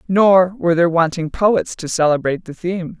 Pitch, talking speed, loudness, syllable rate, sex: 175 Hz, 180 wpm, -16 LUFS, 5.7 syllables/s, female